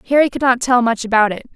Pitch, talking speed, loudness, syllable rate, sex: 240 Hz, 270 wpm, -15 LUFS, 7.0 syllables/s, female